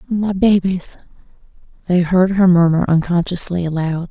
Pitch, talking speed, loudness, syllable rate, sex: 180 Hz, 115 wpm, -16 LUFS, 4.6 syllables/s, female